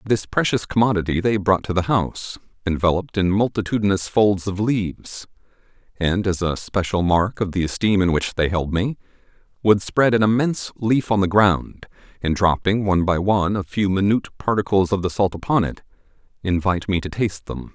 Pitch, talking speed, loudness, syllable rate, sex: 100 Hz, 185 wpm, -20 LUFS, 5.5 syllables/s, male